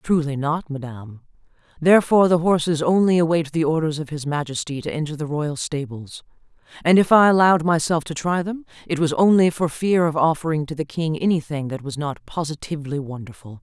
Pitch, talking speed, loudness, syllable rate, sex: 155 Hz, 185 wpm, -20 LUFS, 5.7 syllables/s, female